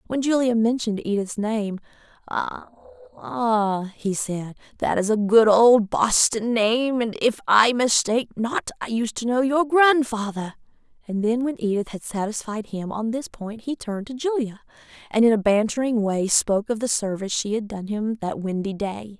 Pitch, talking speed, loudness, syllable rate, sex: 225 Hz, 175 wpm, -22 LUFS, 4.9 syllables/s, female